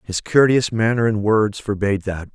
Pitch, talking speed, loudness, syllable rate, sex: 105 Hz, 180 wpm, -18 LUFS, 5.0 syllables/s, male